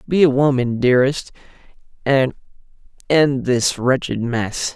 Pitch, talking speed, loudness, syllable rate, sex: 130 Hz, 115 wpm, -18 LUFS, 4.2 syllables/s, male